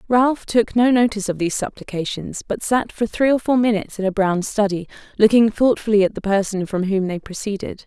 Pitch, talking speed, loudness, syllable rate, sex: 210 Hz, 205 wpm, -19 LUFS, 5.7 syllables/s, female